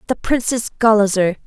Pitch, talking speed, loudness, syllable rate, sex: 220 Hz, 125 wpm, -17 LUFS, 5.2 syllables/s, female